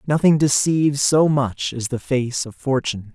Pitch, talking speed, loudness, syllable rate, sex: 135 Hz, 170 wpm, -19 LUFS, 4.7 syllables/s, male